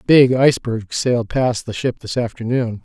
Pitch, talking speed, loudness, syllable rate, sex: 120 Hz, 190 wpm, -18 LUFS, 5.0 syllables/s, male